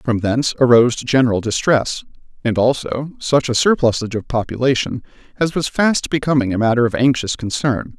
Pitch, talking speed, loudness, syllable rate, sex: 125 Hz, 160 wpm, -17 LUFS, 5.5 syllables/s, male